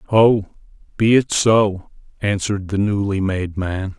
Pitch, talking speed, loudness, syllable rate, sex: 100 Hz, 135 wpm, -18 LUFS, 4.1 syllables/s, male